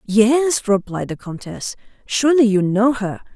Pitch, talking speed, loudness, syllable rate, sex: 225 Hz, 145 wpm, -18 LUFS, 4.6 syllables/s, female